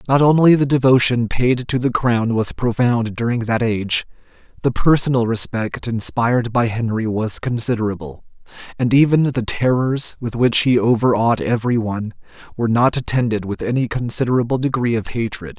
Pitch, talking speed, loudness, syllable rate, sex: 120 Hz, 155 wpm, -18 LUFS, 5.4 syllables/s, male